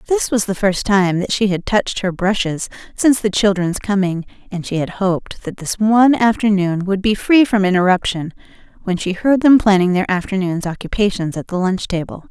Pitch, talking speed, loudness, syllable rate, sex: 195 Hz, 195 wpm, -16 LUFS, 5.3 syllables/s, female